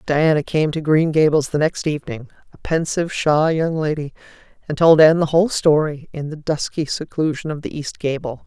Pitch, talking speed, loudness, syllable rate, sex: 155 Hz, 190 wpm, -18 LUFS, 5.5 syllables/s, female